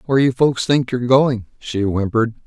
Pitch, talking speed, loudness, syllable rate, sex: 125 Hz, 195 wpm, -18 LUFS, 5.7 syllables/s, male